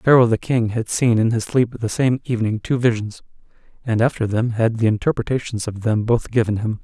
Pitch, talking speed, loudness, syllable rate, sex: 115 Hz, 210 wpm, -19 LUFS, 5.5 syllables/s, male